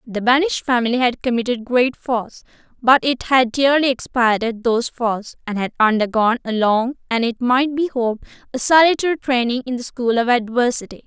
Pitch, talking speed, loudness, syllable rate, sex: 245 Hz, 175 wpm, -18 LUFS, 5.3 syllables/s, female